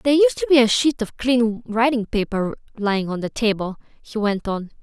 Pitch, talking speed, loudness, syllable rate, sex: 230 Hz, 210 wpm, -20 LUFS, 5.3 syllables/s, female